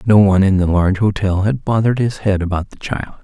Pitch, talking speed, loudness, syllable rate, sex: 100 Hz, 240 wpm, -16 LUFS, 6.2 syllables/s, male